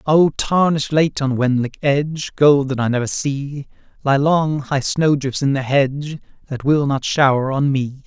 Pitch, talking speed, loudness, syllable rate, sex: 140 Hz, 180 wpm, -18 LUFS, 4.4 syllables/s, male